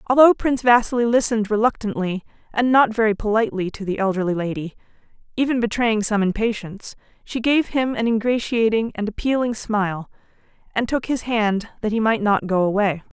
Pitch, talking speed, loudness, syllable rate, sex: 220 Hz, 160 wpm, -20 LUFS, 5.7 syllables/s, female